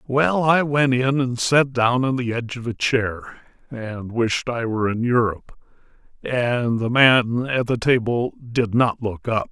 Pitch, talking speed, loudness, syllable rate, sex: 125 Hz, 185 wpm, -20 LUFS, 4.2 syllables/s, male